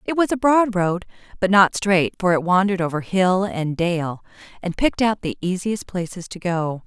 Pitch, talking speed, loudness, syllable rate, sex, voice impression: 185 Hz, 200 wpm, -20 LUFS, 4.9 syllables/s, female, very feminine, very middle-aged, very thin, very tensed, powerful, bright, slightly soft, clear, halting, slightly raspy, slightly cool, very intellectual, refreshing, sincere, slightly calm, friendly, reassuring, unique, elegant, sweet, lively, kind, slightly intense